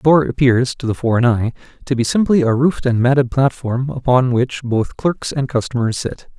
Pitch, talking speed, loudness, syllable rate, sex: 130 Hz, 205 wpm, -17 LUFS, 5.4 syllables/s, male